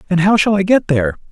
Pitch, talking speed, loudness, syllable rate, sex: 175 Hz, 275 wpm, -14 LUFS, 6.9 syllables/s, male